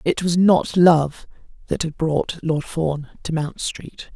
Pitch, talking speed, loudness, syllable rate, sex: 160 Hz, 175 wpm, -20 LUFS, 3.4 syllables/s, female